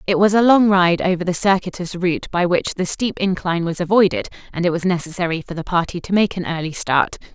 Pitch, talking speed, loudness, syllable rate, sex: 180 Hz, 230 wpm, -18 LUFS, 6.2 syllables/s, female